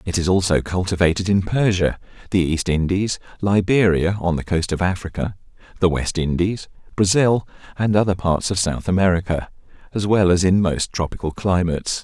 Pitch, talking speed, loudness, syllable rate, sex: 90 Hz, 160 wpm, -20 LUFS, 5.2 syllables/s, male